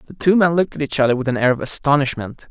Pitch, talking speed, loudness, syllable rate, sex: 140 Hz, 290 wpm, -18 LUFS, 7.4 syllables/s, male